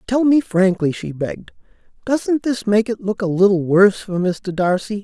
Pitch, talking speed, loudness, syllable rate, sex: 200 Hz, 190 wpm, -18 LUFS, 4.8 syllables/s, male